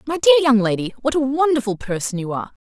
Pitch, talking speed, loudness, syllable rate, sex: 250 Hz, 230 wpm, -18 LUFS, 6.9 syllables/s, female